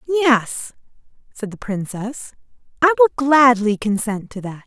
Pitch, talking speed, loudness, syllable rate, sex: 240 Hz, 130 wpm, -18 LUFS, 4.6 syllables/s, female